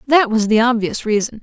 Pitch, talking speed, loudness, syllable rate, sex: 230 Hz, 210 wpm, -16 LUFS, 5.3 syllables/s, female